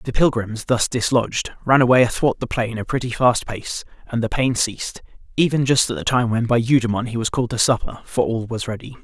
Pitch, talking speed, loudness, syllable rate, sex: 120 Hz, 225 wpm, -20 LUFS, 5.7 syllables/s, male